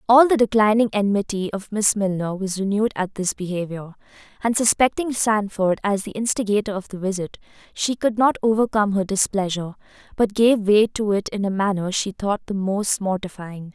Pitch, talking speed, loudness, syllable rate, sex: 205 Hz, 175 wpm, -21 LUFS, 5.4 syllables/s, female